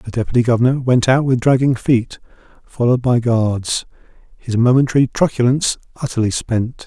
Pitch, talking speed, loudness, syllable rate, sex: 120 Hz, 140 wpm, -16 LUFS, 5.4 syllables/s, male